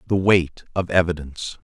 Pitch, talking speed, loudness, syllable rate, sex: 85 Hz, 140 wpm, -21 LUFS, 5.3 syllables/s, male